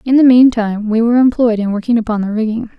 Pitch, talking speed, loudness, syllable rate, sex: 230 Hz, 260 wpm, -13 LUFS, 6.5 syllables/s, female